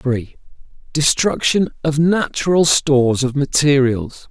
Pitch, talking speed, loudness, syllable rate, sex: 140 Hz, 100 wpm, -16 LUFS, 3.9 syllables/s, male